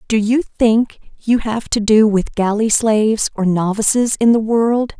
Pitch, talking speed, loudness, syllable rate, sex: 220 Hz, 180 wpm, -15 LUFS, 4.1 syllables/s, female